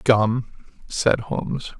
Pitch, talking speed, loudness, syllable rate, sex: 120 Hz, 100 wpm, -23 LUFS, 3.1 syllables/s, male